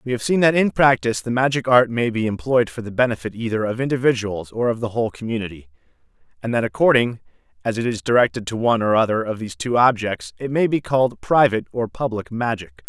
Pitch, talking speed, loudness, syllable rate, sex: 115 Hz, 215 wpm, -20 LUFS, 6.3 syllables/s, male